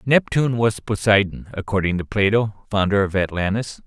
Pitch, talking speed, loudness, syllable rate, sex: 105 Hz, 140 wpm, -20 LUFS, 5.2 syllables/s, male